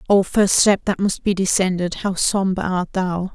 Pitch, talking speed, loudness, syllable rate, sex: 190 Hz, 195 wpm, -19 LUFS, 4.4 syllables/s, female